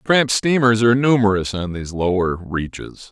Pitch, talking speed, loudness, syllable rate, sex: 110 Hz, 155 wpm, -18 LUFS, 5.2 syllables/s, male